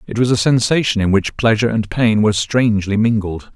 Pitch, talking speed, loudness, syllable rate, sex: 110 Hz, 200 wpm, -16 LUFS, 5.9 syllables/s, male